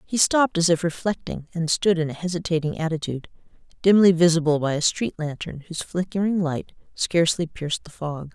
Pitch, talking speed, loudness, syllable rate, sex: 170 Hz, 175 wpm, -23 LUFS, 5.8 syllables/s, female